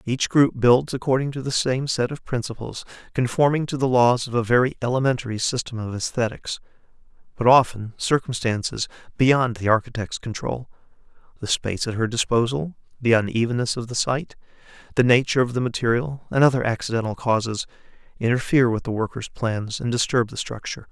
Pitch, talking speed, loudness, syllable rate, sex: 120 Hz, 155 wpm, -22 LUFS, 5.7 syllables/s, male